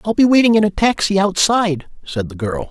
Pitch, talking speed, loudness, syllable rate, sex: 185 Hz, 220 wpm, -15 LUFS, 5.8 syllables/s, male